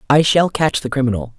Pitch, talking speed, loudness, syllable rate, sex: 135 Hz, 215 wpm, -16 LUFS, 5.8 syllables/s, female